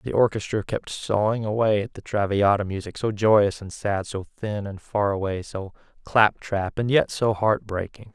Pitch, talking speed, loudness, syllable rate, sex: 105 Hz, 190 wpm, -24 LUFS, 4.5 syllables/s, male